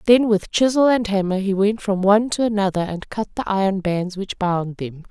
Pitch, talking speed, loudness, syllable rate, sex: 200 Hz, 225 wpm, -20 LUFS, 5.2 syllables/s, female